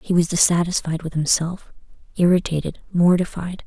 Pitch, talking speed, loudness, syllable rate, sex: 170 Hz, 115 wpm, -20 LUFS, 5.3 syllables/s, female